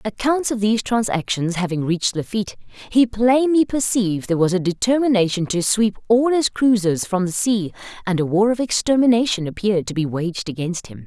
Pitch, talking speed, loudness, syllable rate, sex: 205 Hz, 180 wpm, -19 LUFS, 5.6 syllables/s, female